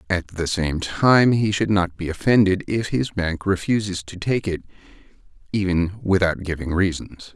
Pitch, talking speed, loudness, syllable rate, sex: 95 Hz, 165 wpm, -21 LUFS, 4.6 syllables/s, male